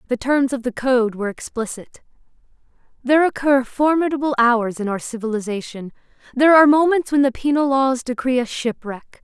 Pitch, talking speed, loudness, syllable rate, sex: 255 Hz, 155 wpm, -18 LUFS, 5.5 syllables/s, female